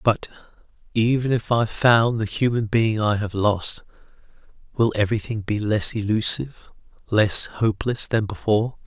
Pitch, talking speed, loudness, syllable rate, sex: 110 Hz, 135 wpm, -22 LUFS, 4.4 syllables/s, male